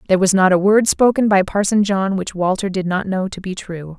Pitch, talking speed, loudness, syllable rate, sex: 190 Hz, 255 wpm, -17 LUFS, 5.5 syllables/s, female